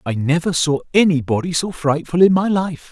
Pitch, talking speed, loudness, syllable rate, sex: 165 Hz, 205 wpm, -17 LUFS, 5.3 syllables/s, male